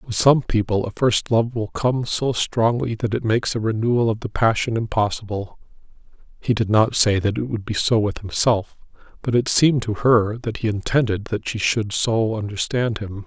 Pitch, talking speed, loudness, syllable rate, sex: 110 Hz, 200 wpm, -20 LUFS, 5.0 syllables/s, male